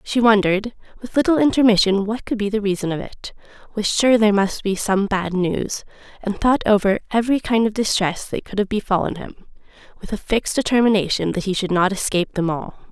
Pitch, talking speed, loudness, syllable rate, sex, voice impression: 210 Hz, 200 wpm, -19 LUFS, 5.8 syllables/s, female, very feminine, young, very thin, slightly relaxed, slightly weak, bright, hard, very clear, very fluent, slightly raspy, very cute, intellectual, very refreshing, sincere, slightly calm, very friendly, very reassuring, very unique, slightly elegant, slightly wild, sweet, very lively, kind, intense, slightly sharp